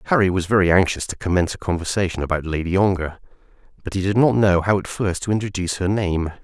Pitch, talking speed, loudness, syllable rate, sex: 95 Hz, 215 wpm, -20 LUFS, 6.7 syllables/s, male